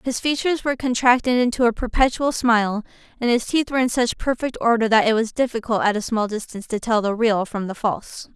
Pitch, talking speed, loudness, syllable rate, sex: 235 Hz, 225 wpm, -20 LUFS, 6.1 syllables/s, female